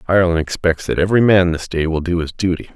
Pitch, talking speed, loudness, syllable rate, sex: 90 Hz, 240 wpm, -17 LUFS, 6.7 syllables/s, male